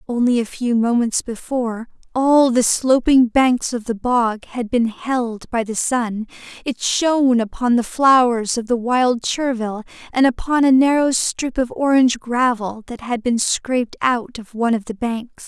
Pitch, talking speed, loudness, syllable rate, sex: 240 Hz, 175 wpm, -18 LUFS, 4.3 syllables/s, female